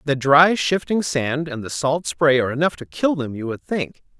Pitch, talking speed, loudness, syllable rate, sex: 150 Hz, 230 wpm, -20 LUFS, 4.9 syllables/s, male